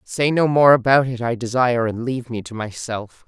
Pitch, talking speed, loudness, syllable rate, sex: 125 Hz, 220 wpm, -19 LUFS, 5.4 syllables/s, female